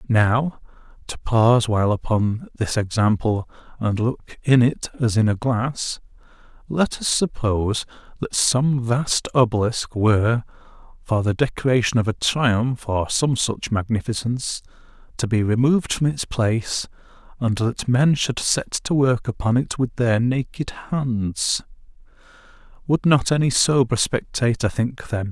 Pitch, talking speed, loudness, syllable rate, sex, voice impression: 120 Hz, 140 wpm, -21 LUFS, 3.8 syllables/s, male, masculine, adult-like, slightly cool, slightly intellectual, sincere, slightly calm